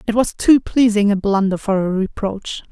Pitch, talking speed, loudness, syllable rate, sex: 205 Hz, 200 wpm, -17 LUFS, 4.8 syllables/s, female